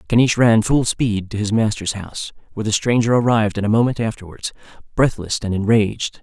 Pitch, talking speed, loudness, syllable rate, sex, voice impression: 110 Hz, 175 wpm, -18 LUFS, 6.0 syllables/s, male, masculine, very adult-like, slightly thick, slightly muffled, cool, sincere, calm, slightly kind